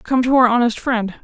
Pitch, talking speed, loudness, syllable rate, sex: 240 Hz, 245 wpm, -16 LUFS, 5.6 syllables/s, female